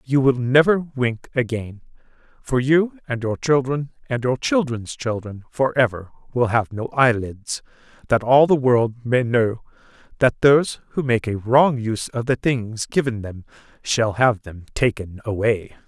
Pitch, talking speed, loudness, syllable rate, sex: 120 Hz, 160 wpm, -20 LUFS, 4.2 syllables/s, male